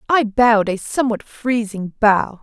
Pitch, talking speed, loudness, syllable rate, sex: 225 Hz, 150 wpm, -18 LUFS, 4.6 syllables/s, female